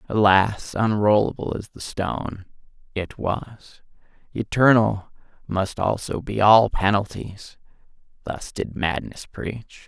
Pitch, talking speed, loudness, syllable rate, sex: 105 Hz, 105 wpm, -22 LUFS, 3.7 syllables/s, male